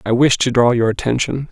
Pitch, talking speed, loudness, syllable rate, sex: 125 Hz, 240 wpm, -16 LUFS, 5.7 syllables/s, male